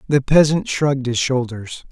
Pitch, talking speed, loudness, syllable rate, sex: 135 Hz, 155 wpm, -18 LUFS, 4.6 syllables/s, male